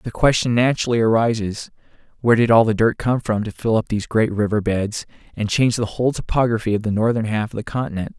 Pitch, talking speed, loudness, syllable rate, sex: 110 Hz, 220 wpm, -19 LUFS, 6.4 syllables/s, male